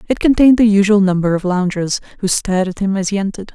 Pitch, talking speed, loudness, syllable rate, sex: 200 Hz, 235 wpm, -15 LUFS, 7.0 syllables/s, female